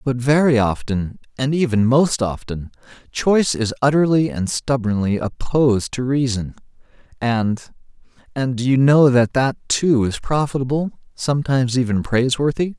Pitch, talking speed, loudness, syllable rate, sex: 130 Hz, 130 wpm, -18 LUFS, 4.7 syllables/s, male